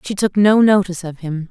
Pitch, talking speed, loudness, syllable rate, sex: 190 Hz, 240 wpm, -15 LUFS, 5.7 syllables/s, female